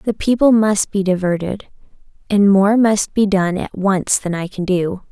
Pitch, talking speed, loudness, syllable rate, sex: 195 Hz, 190 wpm, -16 LUFS, 4.4 syllables/s, female